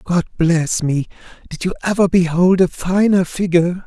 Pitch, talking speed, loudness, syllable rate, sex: 180 Hz, 155 wpm, -16 LUFS, 4.8 syllables/s, male